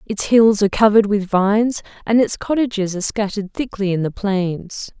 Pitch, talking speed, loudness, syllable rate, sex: 205 Hz, 180 wpm, -17 LUFS, 5.5 syllables/s, female